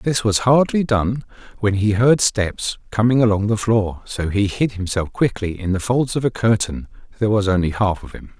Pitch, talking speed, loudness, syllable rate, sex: 110 Hz, 205 wpm, -19 LUFS, 4.9 syllables/s, male